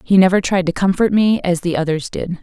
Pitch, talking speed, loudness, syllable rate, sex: 185 Hz, 250 wpm, -16 LUFS, 5.6 syllables/s, female